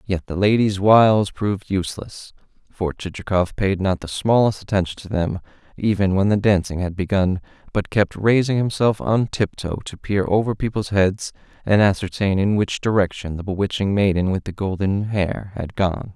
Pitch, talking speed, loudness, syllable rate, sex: 100 Hz, 170 wpm, -20 LUFS, 5.0 syllables/s, male